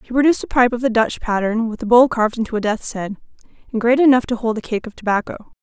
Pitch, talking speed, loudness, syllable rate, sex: 230 Hz, 265 wpm, -18 LUFS, 6.7 syllables/s, female